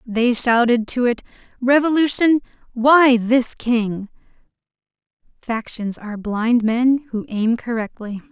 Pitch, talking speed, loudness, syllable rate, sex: 240 Hz, 110 wpm, -18 LUFS, 3.8 syllables/s, female